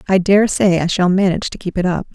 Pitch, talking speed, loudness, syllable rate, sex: 185 Hz, 280 wpm, -16 LUFS, 6.3 syllables/s, female